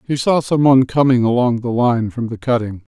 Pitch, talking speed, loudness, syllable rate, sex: 125 Hz, 225 wpm, -16 LUFS, 5.5 syllables/s, male